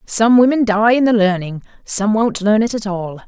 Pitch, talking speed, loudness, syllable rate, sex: 215 Hz, 220 wpm, -15 LUFS, 4.8 syllables/s, female